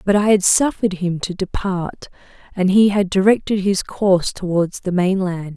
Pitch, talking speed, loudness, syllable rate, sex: 190 Hz, 175 wpm, -18 LUFS, 4.8 syllables/s, female